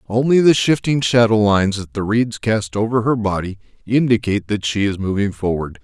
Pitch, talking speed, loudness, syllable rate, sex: 110 Hz, 185 wpm, -17 LUFS, 5.4 syllables/s, male